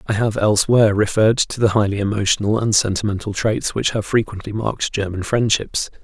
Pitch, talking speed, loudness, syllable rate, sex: 105 Hz, 170 wpm, -18 LUFS, 5.9 syllables/s, male